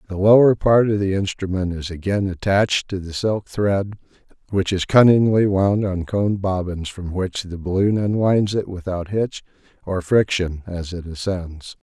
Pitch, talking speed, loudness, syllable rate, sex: 95 Hz, 165 wpm, -20 LUFS, 4.5 syllables/s, male